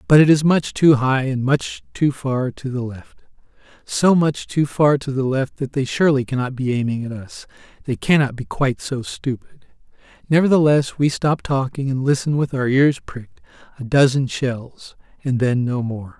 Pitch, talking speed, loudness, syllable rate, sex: 135 Hz, 180 wpm, -19 LUFS, 4.8 syllables/s, male